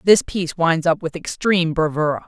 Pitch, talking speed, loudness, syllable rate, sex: 170 Hz, 185 wpm, -19 LUFS, 5.5 syllables/s, female